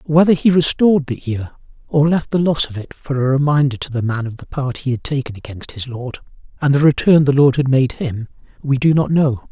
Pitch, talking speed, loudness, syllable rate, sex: 140 Hz, 240 wpm, -17 LUFS, 5.5 syllables/s, male